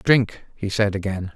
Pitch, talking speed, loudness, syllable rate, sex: 105 Hz, 180 wpm, -23 LUFS, 4.4 syllables/s, male